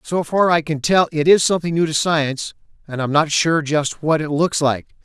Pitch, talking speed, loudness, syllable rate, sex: 155 Hz, 250 wpm, -18 LUFS, 5.4 syllables/s, male